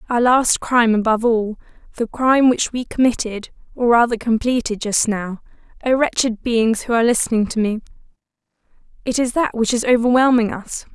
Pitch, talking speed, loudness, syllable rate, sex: 235 Hz, 155 wpm, -18 LUFS, 5.5 syllables/s, female